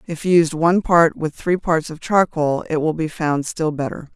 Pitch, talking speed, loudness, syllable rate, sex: 160 Hz, 215 wpm, -19 LUFS, 4.6 syllables/s, female